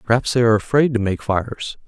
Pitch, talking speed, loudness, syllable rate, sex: 115 Hz, 225 wpm, -18 LUFS, 6.5 syllables/s, male